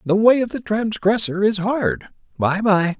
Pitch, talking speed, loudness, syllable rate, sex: 205 Hz, 180 wpm, -19 LUFS, 4.4 syllables/s, male